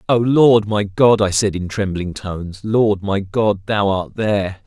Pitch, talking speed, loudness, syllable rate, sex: 105 Hz, 195 wpm, -17 LUFS, 4.1 syllables/s, male